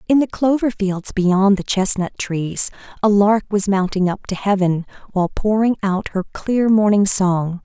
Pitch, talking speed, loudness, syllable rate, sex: 200 Hz, 175 wpm, -18 LUFS, 4.3 syllables/s, female